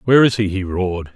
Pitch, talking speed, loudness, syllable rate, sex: 100 Hz, 260 wpm, -18 LUFS, 6.8 syllables/s, male